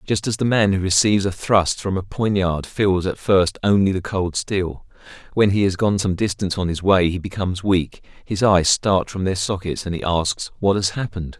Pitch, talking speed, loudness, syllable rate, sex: 95 Hz, 220 wpm, -20 LUFS, 5.1 syllables/s, male